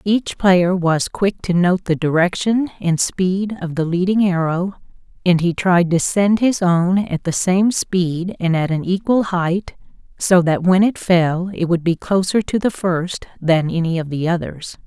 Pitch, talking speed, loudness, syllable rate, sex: 180 Hz, 190 wpm, -17 LUFS, 4.1 syllables/s, female